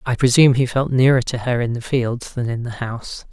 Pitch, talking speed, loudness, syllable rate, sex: 125 Hz, 255 wpm, -18 LUFS, 5.7 syllables/s, male